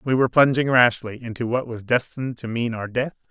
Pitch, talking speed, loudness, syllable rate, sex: 120 Hz, 220 wpm, -21 LUFS, 5.8 syllables/s, male